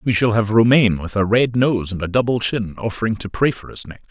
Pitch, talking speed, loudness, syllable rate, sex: 110 Hz, 265 wpm, -18 LUFS, 5.8 syllables/s, male